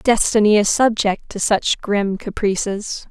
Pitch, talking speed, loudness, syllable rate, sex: 210 Hz, 135 wpm, -18 LUFS, 4.0 syllables/s, female